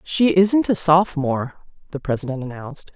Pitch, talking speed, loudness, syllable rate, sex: 160 Hz, 140 wpm, -19 LUFS, 5.7 syllables/s, female